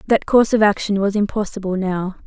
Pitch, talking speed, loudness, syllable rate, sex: 200 Hz, 185 wpm, -18 LUFS, 6.0 syllables/s, female